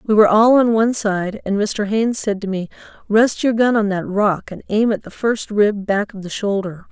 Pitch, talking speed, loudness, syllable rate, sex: 210 Hz, 245 wpm, -18 LUFS, 5.1 syllables/s, female